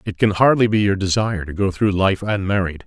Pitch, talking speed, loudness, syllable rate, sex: 100 Hz, 230 wpm, -18 LUFS, 5.8 syllables/s, male